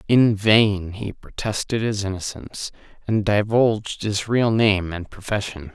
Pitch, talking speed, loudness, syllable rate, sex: 105 Hz, 135 wpm, -21 LUFS, 4.2 syllables/s, male